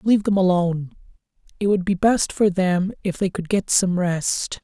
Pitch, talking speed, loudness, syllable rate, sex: 185 Hz, 195 wpm, -20 LUFS, 4.8 syllables/s, male